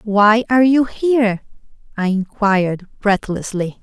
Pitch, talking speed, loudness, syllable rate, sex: 215 Hz, 110 wpm, -16 LUFS, 4.3 syllables/s, female